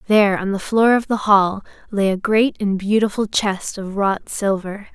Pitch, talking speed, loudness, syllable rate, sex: 205 Hz, 195 wpm, -18 LUFS, 4.5 syllables/s, female